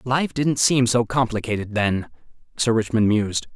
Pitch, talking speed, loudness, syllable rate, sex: 115 Hz, 150 wpm, -21 LUFS, 4.8 syllables/s, male